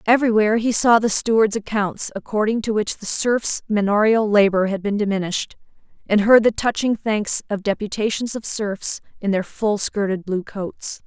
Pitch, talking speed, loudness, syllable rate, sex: 210 Hz, 170 wpm, -20 LUFS, 5.0 syllables/s, female